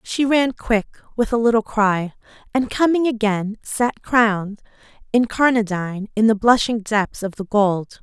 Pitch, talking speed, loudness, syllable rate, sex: 220 Hz, 150 wpm, -19 LUFS, 4.4 syllables/s, female